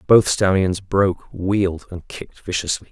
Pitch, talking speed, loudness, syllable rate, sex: 95 Hz, 145 wpm, -19 LUFS, 4.8 syllables/s, male